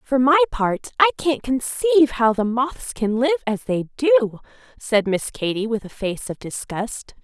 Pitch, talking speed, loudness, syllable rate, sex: 250 Hz, 180 wpm, -21 LUFS, 4.2 syllables/s, female